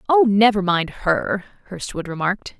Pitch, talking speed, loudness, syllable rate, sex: 200 Hz, 140 wpm, -20 LUFS, 4.7 syllables/s, female